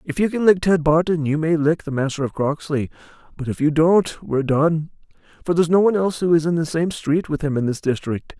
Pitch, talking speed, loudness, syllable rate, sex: 160 Hz, 250 wpm, -20 LUFS, 5.9 syllables/s, male